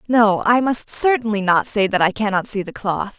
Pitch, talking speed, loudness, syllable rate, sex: 215 Hz, 225 wpm, -18 LUFS, 5.0 syllables/s, female